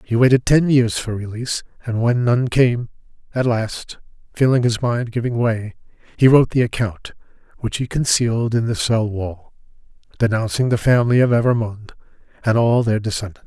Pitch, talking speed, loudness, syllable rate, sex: 115 Hz, 165 wpm, -18 LUFS, 5.3 syllables/s, male